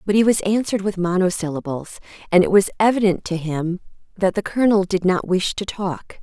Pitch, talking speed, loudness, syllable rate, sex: 185 Hz, 195 wpm, -20 LUFS, 5.7 syllables/s, female